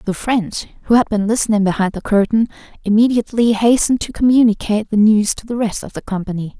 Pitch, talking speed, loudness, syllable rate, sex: 215 Hz, 190 wpm, -16 LUFS, 6.2 syllables/s, female